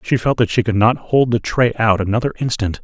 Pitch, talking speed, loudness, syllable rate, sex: 115 Hz, 255 wpm, -17 LUFS, 5.7 syllables/s, male